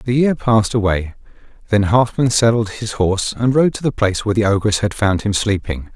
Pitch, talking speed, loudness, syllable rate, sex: 110 Hz, 210 wpm, -17 LUFS, 5.8 syllables/s, male